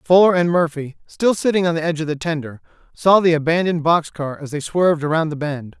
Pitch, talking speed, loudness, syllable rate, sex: 160 Hz, 230 wpm, -18 LUFS, 6.1 syllables/s, male